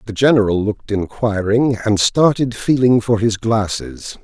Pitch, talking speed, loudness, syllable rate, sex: 110 Hz, 140 wpm, -16 LUFS, 4.5 syllables/s, male